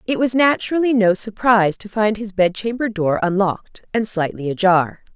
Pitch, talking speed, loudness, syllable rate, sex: 205 Hz, 175 wpm, -18 LUFS, 5.3 syllables/s, female